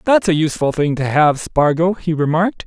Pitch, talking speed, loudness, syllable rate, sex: 160 Hz, 200 wpm, -16 LUFS, 5.5 syllables/s, male